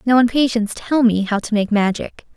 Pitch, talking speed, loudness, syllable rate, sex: 225 Hz, 230 wpm, -17 LUFS, 5.5 syllables/s, female